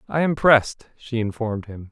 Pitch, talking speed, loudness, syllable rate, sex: 120 Hz, 190 wpm, -21 LUFS, 5.4 syllables/s, male